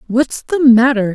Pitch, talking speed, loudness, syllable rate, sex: 245 Hz, 160 wpm, -13 LUFS, 4.1 syllables/s, female